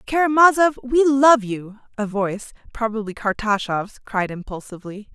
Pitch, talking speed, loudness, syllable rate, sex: 230 Hz, 115 wpm, -19 LUFS, 4.9 syllables/s, female